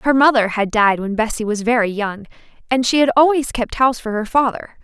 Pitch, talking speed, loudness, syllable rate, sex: 235 Hz, 225 wpm, -17 LUFS, 5.5 syllables/s, female